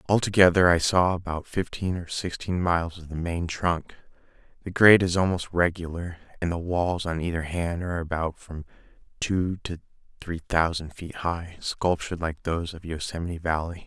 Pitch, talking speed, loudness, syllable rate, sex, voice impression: 85 Hz, 165 wpm, -25 LUFS, 5.1 syllables/s, male, masculine, adult-like, relaxed, weak, muffled, halting, sincere, calm, friendly, reassuring, unique, modest